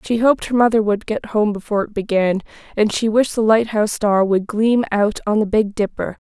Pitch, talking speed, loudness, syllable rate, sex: 215 Hz, 220 wpm, -18 LUFS, 5.6 syllables/s, female